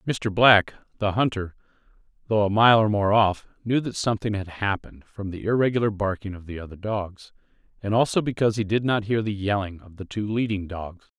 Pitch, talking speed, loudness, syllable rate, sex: 105 Hz, 200 wpm, -23 LUFS, 5.5 syllables/s, male